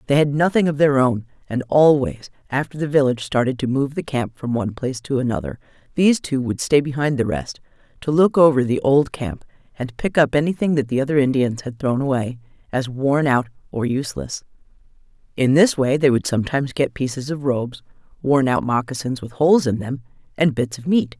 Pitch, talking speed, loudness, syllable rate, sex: 135 Hz, 200 wpm, -20 LUFS, 5.7 syllables/s, female